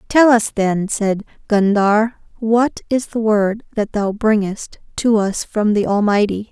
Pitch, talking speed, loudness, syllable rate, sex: 215 Hz, 155 wpm, -17 LUFS, 3.9 syllables/s, female